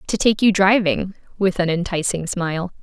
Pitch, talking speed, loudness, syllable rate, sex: 185 Hz, 170 wpm, -19 LUFS, 5.0 syllables/s, female